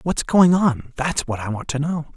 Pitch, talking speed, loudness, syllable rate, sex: 145 Hz, 250 wpm, -20 LUFS, 4.5 syllables/s, male